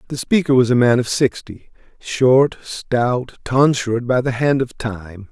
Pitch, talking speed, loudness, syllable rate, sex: 125 Hz, 170 wpm, -17 LUFS, 4.0 syllables/s, male